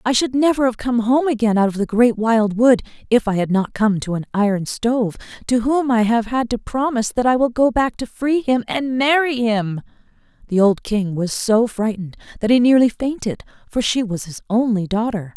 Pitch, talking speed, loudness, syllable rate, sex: 230 Hz, 220 wpm, -18 LUFS, 5.2 syllables/s, female